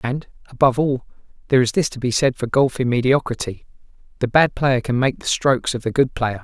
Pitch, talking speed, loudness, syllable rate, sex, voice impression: 125 Hz, 215 wpm, -19 LUFS, 6.0 syllables/s, male, masculine, adult-like, fluent, slightly refreshing, sincere